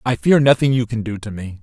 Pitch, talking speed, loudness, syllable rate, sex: 115 Hz, 295 wpm, -17 LUFS, 6.0 syllables/s, male